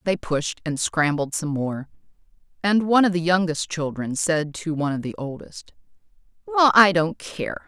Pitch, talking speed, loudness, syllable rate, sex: 160 Hz, 170 wpm, -22 LUFS, 4.7 syllables/s, female